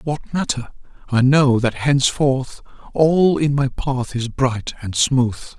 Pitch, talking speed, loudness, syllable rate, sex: 130 Hz, 140 wpm, -18 LUFS, 3.7 syllables/s, male